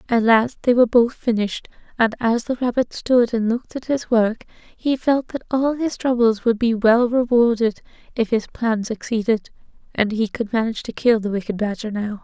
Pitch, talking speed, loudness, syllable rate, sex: 230 Hz, 195 wpm, -20 LUFS, 5.1 syllables/s, female